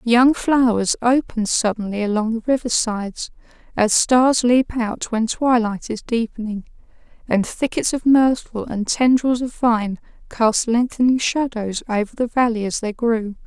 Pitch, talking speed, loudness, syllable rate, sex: 230 Hz, 145 wpm, -19 LUFS, 4.4 syllables/s, female